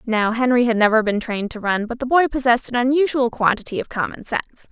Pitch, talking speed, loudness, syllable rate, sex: 240 Hz, 230 wpm, -19 LUFS, 6.3 syllables/s, female